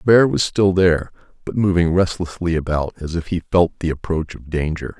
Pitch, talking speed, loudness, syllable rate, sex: 85 Hz, 205 wpm, -19 LUFS, 5.5 syllables/s, male